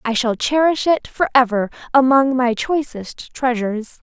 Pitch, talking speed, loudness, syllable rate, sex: 255 Hz, 130 wpm, -18 LUFS, 4.3 syllables/s, female